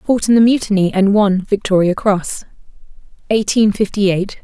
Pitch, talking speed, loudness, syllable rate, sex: 200 Hz, 150 wpm, -14 LUFS, 5.0 syllables/s, female